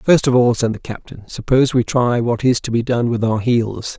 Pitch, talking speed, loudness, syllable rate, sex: 120 Hz, 255 wpm, -17 LUFS, 5.1 syllables/s, male